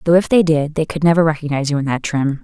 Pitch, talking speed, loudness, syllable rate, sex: 155 Hz, 295 wpm, -16 LUFS, 6.9 syllables/s, female